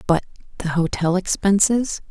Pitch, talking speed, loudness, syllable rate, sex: 190 Hz, 115 wpm, -20 LUFS, 4.6 syllables/s, female